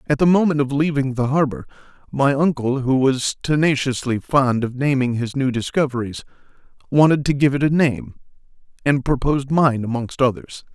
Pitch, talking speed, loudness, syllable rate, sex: 135 Hz, 160 wpm, -19 LUFS, 5.2 syllables/s, male